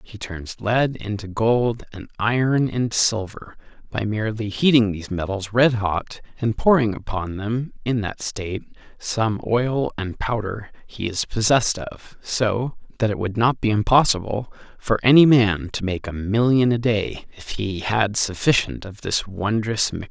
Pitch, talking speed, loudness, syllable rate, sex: 110 Hz, 165 wpm, -21 LUFS, 4.5 syllables/s, male